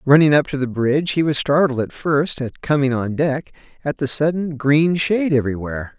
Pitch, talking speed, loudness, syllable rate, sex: 145 Hz, 200 wpm, -19 LUFS, 5.4 syllables/s, male